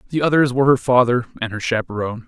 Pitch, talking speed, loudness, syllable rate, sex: 125 Hz, 210 wpm, -18 LUFS, 7.4 syllables/s, male